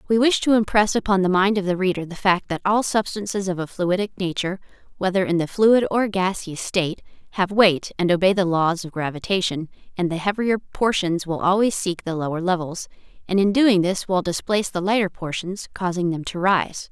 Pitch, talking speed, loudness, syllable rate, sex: 185 Hz, 200 wpm, -21 LUFS, 5.4 syllables/s, female